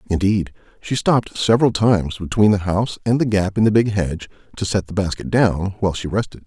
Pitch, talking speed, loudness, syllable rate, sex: 100 Hz, 215 wpm, -19 LUFS, 6.0 syllables/s, male